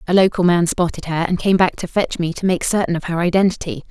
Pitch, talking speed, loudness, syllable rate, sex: 175 Hz, 260 wpm, -18 LUFS, 6.3 syllables/s, female